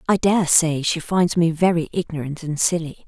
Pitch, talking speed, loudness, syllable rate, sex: 165 Hz, 195 wpm, -20 LUFS, 4.9 syllables/s, female